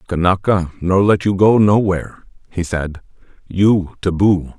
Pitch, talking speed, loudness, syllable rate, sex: 95 Hz, 130 wpm, -16 LUFS, 4.3 syllables/s, male